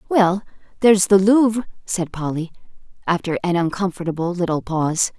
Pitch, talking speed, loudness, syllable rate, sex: 185 Hz, 125 wpm, -19 LUFS, 5.6 syllables/s, female